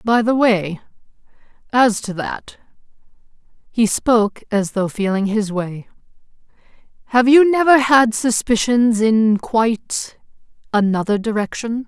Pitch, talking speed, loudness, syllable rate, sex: 225 Hz, 100 wpm, -17 LUFS, 4.1 syllables/s, female